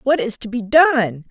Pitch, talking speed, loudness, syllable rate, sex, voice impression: 240 Hz, 230 wpm, -17 LUFS, 4.3 syllables/s, female, feminine, adult-like, tensed, powerful, bright, fluent, intellectual, slightly calm, friendly, unique, lively, slightly strict